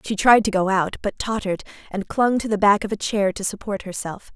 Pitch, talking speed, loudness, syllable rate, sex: 205 Hz, 250 wpm, -21 LUFS, 5.6 syllables/s, female